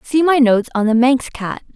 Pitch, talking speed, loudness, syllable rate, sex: 250 Hz, 240 wpm, -15 LUFS, 5.3 syllables/s, female